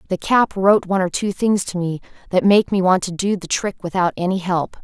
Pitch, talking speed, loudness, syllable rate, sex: 190 Hz, 250 wpm, -18 LUFS, 5.6 syllables/s, female